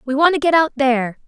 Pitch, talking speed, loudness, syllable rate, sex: 280 Hz, 285 wpm, -16 LUFS, 6.8 syllables/s, female